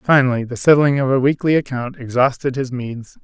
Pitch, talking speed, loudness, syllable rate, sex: 135 Hz, 185 wpm, -17 LUFS, 5.4 syllables/s, male